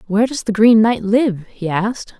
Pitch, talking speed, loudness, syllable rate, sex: 215 Hz, 220 wpm, -16 LUFS, 5.1 syllables/s, female